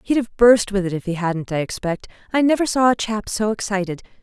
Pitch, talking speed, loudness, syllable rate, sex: 210 Hz, 240 wpm, -20 LUFS, 5.7 syllables/s, female